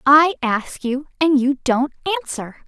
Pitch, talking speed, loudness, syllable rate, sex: 280 Hz, 155 wpm, -19 LUFS, 4.0 syllables/s, female